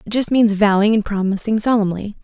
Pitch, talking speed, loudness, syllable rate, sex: 210 Hz, 190 wpm, -17 LUFS, 5.8 syllables/s, female